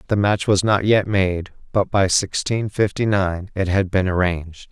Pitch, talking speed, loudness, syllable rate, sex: 95 Hz, 190 wpm, -20 LUFS, 4.4 syllables/s, male